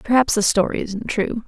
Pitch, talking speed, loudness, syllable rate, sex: 215 Hz, 205 wpm, -20 LUFS, 5.1 syllables/s, female